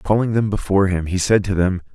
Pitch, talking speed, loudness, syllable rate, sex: 95 Hz, 245 wpm, -18 LUFS, 6.3 syllables/s, male